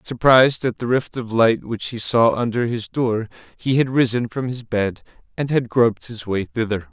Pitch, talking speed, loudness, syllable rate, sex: 115 Hz, 210 wpm, -20 LUFS, 4.8 syllables/s, male